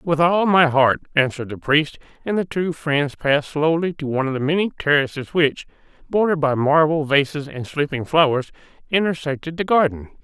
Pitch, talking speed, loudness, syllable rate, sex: 150 Hz, 175 wpm, -19 LUFS, 5.4 syllables/s, male